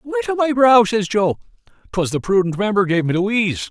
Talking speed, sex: 225 wpm, male